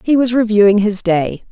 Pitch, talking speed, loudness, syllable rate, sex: 215 Hz, 200 wpm, -13 LUFS, 5.2 syllables/s, female